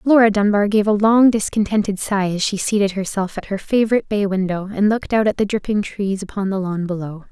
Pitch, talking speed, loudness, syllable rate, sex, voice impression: 200 Hz, 220 wpm, -18 LUFS, 5.9 syllables/s, female, feminine, young, tensed, powerful, soft, slightly muffled, cute, calm, friendly, lively, slightly kind